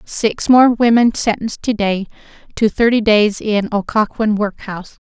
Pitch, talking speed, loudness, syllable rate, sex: 215 Hz, 140 wpm, -15 LUFS, 4.6 syllables/s, female